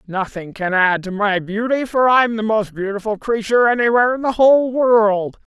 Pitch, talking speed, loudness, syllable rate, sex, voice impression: 220 Hz, 185 wpm, -17 LUFS, 5.1 syllables/s, female, feminine, adult-like, powerful, slightly fluent, unique, intense, slightly sharp